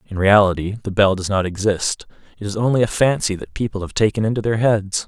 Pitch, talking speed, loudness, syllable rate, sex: 105 Hz, 225 wpm, -19 LUFS, 6.0 syllables/s, male